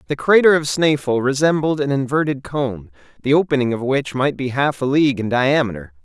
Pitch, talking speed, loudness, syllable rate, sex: 135 Hz, 190 wpm, -18 LUFS, 5.5 syllables/s, male